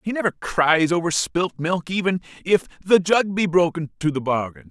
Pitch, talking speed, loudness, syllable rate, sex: 175 Hz, 190 wpm, -21 LUFS, 4.8 syllables/s, male